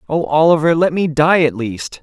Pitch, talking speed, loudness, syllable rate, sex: 155 Hz, 205 wpm, -14 LUFS, 4.9 syllables/s, male